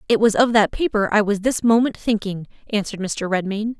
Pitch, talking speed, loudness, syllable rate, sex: 210 Hz, 205 wpm, -20 LUFS, 5.7 syllables/s, female